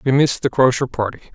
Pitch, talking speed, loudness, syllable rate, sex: 125 Hz, 225 wpm, -18 LUFS, 6.3 syllables/s, male